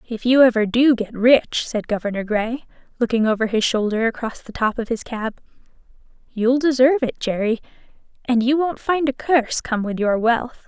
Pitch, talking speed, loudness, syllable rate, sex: 240 Hz, 185 wpm, -19 LUFS, 5.1 syllables/s, female